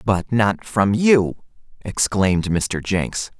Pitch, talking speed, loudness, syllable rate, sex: 105 Hz, 125 wpm, -19 LUFS, 3.1 syllables/s, male